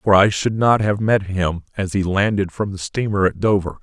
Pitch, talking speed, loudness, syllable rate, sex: 100 Hz, 235 wpm, -19 LUFS, 4.9 syllables/s, male